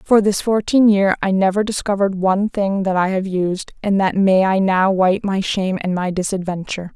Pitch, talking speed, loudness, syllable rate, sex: 195 Hz, 205 wpm, -17 LUFS, 5.2 syllables/s, female